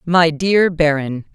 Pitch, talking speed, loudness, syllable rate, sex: 160 Hz, 135 wpm, -15 LUFS, 3.4 syllables/s, female